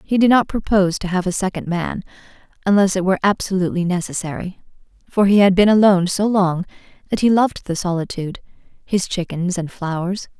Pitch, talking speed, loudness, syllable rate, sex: 190 Hz, 175 wpm, -18 LUFS, 6.1 syllables/s, female